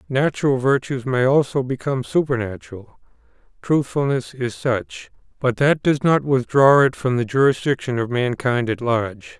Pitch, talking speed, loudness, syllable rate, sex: 130 Hz, 140 wpm, -20 LUFS, 4.8 syllables/s, male